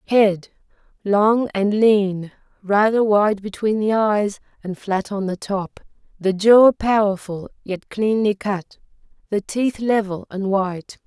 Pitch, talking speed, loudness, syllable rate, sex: 205 Hz, 130 wpm, -19 LUFS, 3.7 syllables/s, female